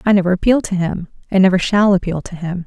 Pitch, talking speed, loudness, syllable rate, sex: 185 Hz, 245 wpm, -16 LUFS, 6.4 syllables/s, female